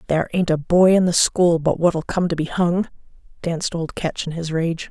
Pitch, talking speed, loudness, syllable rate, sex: 170 Hz, 235 wpm, -20 LUFS, 5.1 syllables/s, female